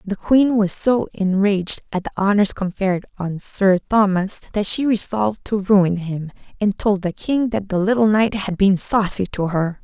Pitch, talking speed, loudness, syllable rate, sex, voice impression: 200 Hz, 190 wpm, -19 LUFS, 4.6 syllables/s, female, very feminine, slightly young, very thin, tensed, slightly weak, very bright, hard, clear, very cute, intellectual, refreshing, very sincere, very calm, very friendly, very reassuring, very unique, very elegant, slightly wild, kind, very modest